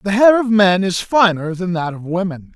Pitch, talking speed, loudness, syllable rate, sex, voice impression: 190 Hz, 235 wpm, -16 LUFS, 4.9 syllables/s, male, very masculine, middle-aged, slightly thick, tensed, slightly powerful, bright, slightly soft, clear, very fluent, raspy, slightly cool, intellectual, very refreshing, slightly sincere, slightly calm, friendly, reassuring, very unique, slightly elegant, wild, slightly sweet, very lively, kind, intense, light